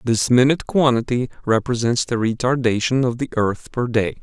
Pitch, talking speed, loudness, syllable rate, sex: 120 Hz, 155 wpm, -19 LUFS, 5.2 syllables/s, male